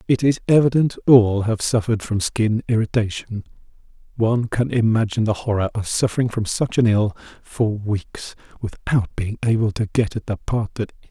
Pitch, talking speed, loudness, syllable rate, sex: 110 Hz, 170 wpm, -20 LUFS, 5.3 syllables/s, male